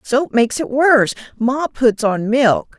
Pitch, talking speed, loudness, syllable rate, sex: 245 Hz, 150 wpm, -16 LUFS, 4.1 syllables/s, female